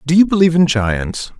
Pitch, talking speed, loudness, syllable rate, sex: 150 Hz, 215 wpm, -14 LUFS, 5.7 syllables/s, male